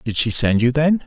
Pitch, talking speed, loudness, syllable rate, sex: 130 Hz, 280 wpm, -17 LUFS, 5.2 syllables/s, male